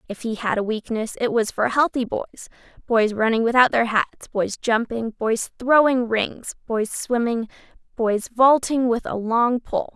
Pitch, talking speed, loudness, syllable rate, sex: 230 Hz, 165 wpm, -21 LUFS, 4.3 syllables/s, female